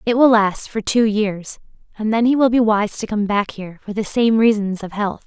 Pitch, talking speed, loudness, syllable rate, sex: 215 Hz, 250 wpm, -18 LUFS, 5.1 syllables/s, female